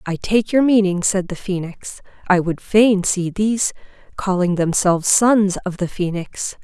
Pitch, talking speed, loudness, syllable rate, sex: 190 Hz, 165 wpm, -18 LUFS, 4.4 syllables/s, female